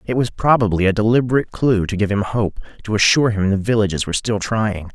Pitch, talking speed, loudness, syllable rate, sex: 105 Hz, 220 wpm, -18 LUFS, 6.3 syllables/s, male